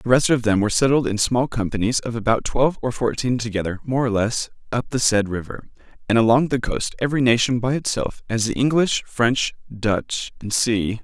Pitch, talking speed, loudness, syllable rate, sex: 120 Hz, 200 wpm, -21 LUFS, 5.3 syllables/s, male